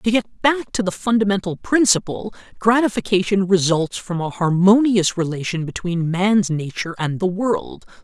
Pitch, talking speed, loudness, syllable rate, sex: 195 Hz, 140 wpm, -19 LUFS, 4.8 syllables/s, male